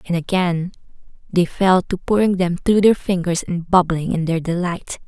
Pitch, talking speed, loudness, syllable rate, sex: 180 Hz, 175 wpm, -18 LUFS, 4.8 syllables/s, female